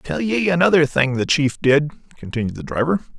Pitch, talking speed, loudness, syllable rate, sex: 150 Hz, 190 wpm, -18 LUFS, 5.0 syllables/s, male